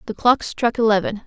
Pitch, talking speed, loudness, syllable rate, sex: 225 Hz, 190 wpm, -19 LUFS, 5.5 syllables/s, female